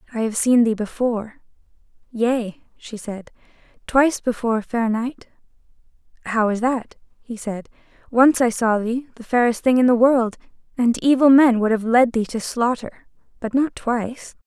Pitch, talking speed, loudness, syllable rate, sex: 235 Hz, 160 wpm, -19 LUFS, 4.7 syllables/s, female